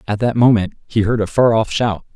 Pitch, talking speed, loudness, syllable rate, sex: 110 Hz, 250 wpm, -16 LUFS, 5.4 syllables/s, male